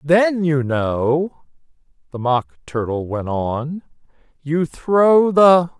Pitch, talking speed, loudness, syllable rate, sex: 150 Hz, 115 wpm, -18 LUFS, 2.8 syllables/s, male